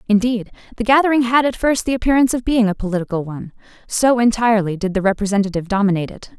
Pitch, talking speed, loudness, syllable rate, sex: 220 Hz, 190 wpm, -17 LUFS, 7.3 syllables/s, female